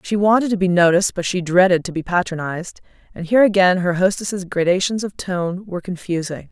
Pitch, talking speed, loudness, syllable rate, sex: 185 Hz, 195 wpm, -18 LUFS, 5.9 syllables/s, female